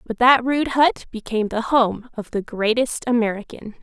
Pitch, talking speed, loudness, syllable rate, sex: 235 Hz, 175 wpm, -20 LUFS, 4.8 syllables/s, female